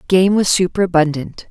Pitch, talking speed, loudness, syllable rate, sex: 175 Hz, 120 wpm, -15 LUFS, 5.2 syllables/s, female